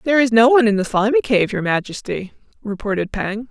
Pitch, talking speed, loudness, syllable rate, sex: 225 Hz, 205 wpm, -17 LUFS, 6.1 syllables/s, female